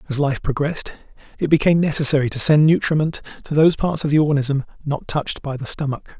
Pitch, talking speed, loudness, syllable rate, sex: 145 Hz, 195 wpm, -19 LUFS, 6.6 syllables/s, male